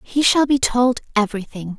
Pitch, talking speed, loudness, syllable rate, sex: 235 Hz, 170 wpm, -18 LUFS, 5.2 syllables/s, female